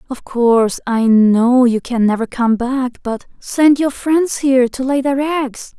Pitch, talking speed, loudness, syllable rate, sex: 255 Hz, 185 wpm, -15 LUFS, 3.9 syllables/s, female